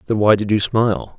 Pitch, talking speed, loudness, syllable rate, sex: 105 Hz, 255 wpm, -17 LUFS, 5.9 syllables/s, male